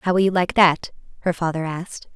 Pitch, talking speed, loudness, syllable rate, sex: 175 Hz, 225 wpm, -20 LUFS, 6.0 syllables/s, female